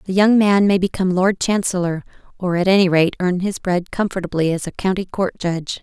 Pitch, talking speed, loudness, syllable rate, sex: 185 Hz, 205 wpm, -18 LUFS, 5.7 syllables/s, female